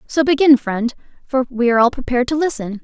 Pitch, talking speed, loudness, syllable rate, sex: 255 Hz, 210 wpm, -17 LUFS, 6.3 syllables/s, female